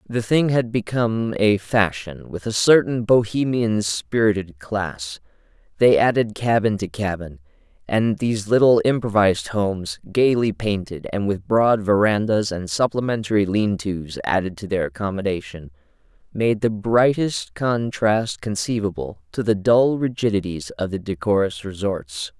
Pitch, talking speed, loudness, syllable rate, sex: 105 Hz, 130 wpm, -21 LUFS, 4.4 syllables/s, male